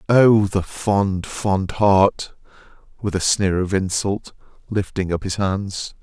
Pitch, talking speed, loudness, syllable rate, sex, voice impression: 100 Hz, 140 wpm, -20 LUFS, 3.3 syllables/s, male, masculine, adult-like, slightly thick, cool, calm, slightly elegant, slightly kind